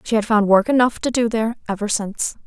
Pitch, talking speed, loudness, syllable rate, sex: 220 Hz, 245 wpm, -19 LUFS, 6.4 syllables/s, female